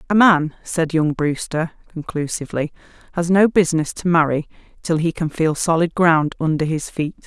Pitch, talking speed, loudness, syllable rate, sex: 165 Hz, 165 wpm, -19 LUFS, 5.1 syllables/s, female